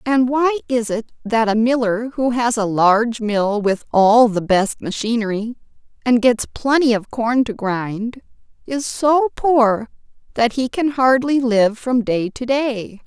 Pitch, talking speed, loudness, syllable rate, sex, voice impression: 235 Hz, 165 wpm, -18 LUFS, 3.9 syllables/s, female, very feminine, very adult-like, thin, tensed, slightly weak, bright, soft, clear, fluent, slightly cute, slightly intellectual, refreshing, sincere, slightly calm, slightly friendly, slightly reassuring, very unique, slightly elegant, wild, slightly sweet, lively, slightly kind, sharp, slightly modest, light